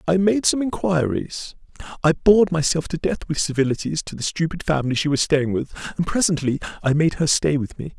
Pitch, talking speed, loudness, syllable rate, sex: 160 Hz, 195 wpm, -21 LUFS, 5.7 syllables/s, male